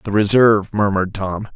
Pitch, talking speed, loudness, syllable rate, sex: 100 Hz, 155 wpm, -16 LUFS, 5.8 syllables/s, male